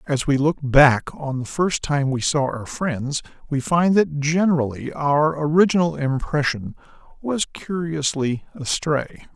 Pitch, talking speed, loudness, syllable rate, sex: 150 Hz, 140 wpm, -21 LUFS, 4.1 syllables/s, male